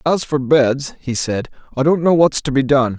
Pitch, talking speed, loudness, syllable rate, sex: 140 Hz, 240 wpm, -16 LUFS, 4.7 syllables/s, male